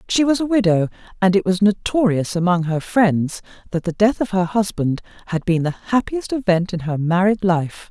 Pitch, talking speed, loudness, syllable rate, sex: 190 Hz, 195 wpm, -19 LUFS, 5.0 syllables/s, female